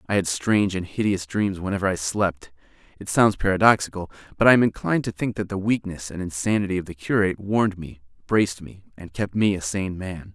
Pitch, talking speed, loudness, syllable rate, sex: 95 Hz, 210 wpm, -23 LUFS, 5.9 syllables/s, male